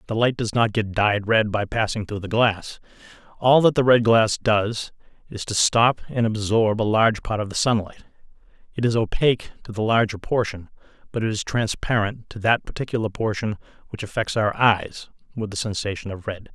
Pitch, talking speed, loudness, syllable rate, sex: 110 Hz, 190 wpm, -22 LUFS, 5.2 syllables/s, male